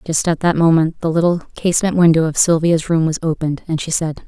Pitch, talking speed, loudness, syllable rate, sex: 165 Hz, 225 wpm, -16 LUFS, 6.1 syllables/s, female